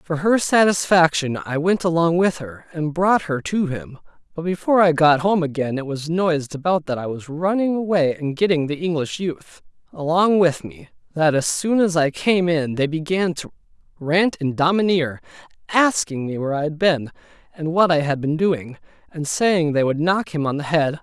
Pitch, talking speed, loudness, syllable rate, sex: 165 Hz, 200 wpm, -20 LUFS, 4.9 syllables/s, male